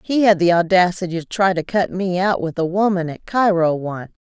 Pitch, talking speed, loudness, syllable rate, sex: 180 Hz, 225 wpm, -18 LUFS, 5.2 syllables/s, female